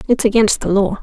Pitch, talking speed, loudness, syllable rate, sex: 215 Hz, 235 wpm, -15 LUFS, 5.8 syllables/s, female